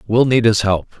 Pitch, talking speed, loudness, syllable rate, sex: 110 Hz, 240 wpm, -15 LUFS, 5.5 syllables/s, male